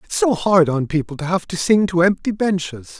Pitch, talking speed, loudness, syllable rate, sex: 180 Hz, 240 wpm, -18 LUFS, 5.2 syllables/s, male